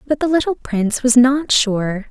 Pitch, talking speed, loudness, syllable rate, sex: 250 Hz, 200 wpm, -16 LUFS, 4.6 syllables/s, female